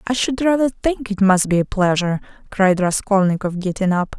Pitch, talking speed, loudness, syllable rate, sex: 200 Hz, 185 wpm, -18 LUFS, 5.4 syllables/s, female